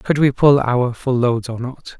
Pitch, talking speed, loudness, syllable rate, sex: 125 Hz, 240 wpm, -17 LUFS, 4.1 syllables/s, male